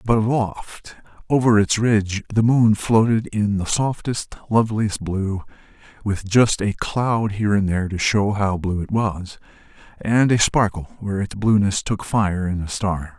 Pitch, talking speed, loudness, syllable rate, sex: 105 Hz, 170 wpm, -20 LUFS, 4.4 syllables/s, male